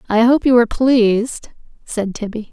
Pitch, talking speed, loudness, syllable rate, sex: 230 Hz, 165 wpm, -16 LUFS, 4.9 syllables/s, female